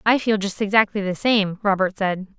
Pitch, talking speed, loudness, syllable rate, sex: 200 Hz, 200 wpm, -20 LUFS, 5.1 syllables/s, female